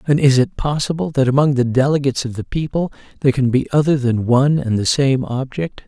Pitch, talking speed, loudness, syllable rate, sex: 135 Hz, 215 wpm, -17 LUFS, 5.9 syllables/s, male